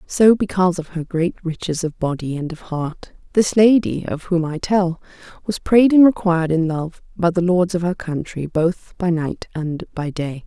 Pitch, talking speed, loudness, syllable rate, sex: 175 Hz, 200 wpm, -19 LUFS, 4.6 syllables/s, female